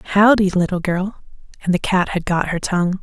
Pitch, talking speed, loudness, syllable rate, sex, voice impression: 185 Hz, 200 wpm, -18 LUFS, 5.6 syllables/s, female, feminine, slightly adult-like, slightly tensed, clear, calm, reassuring, slightly elegant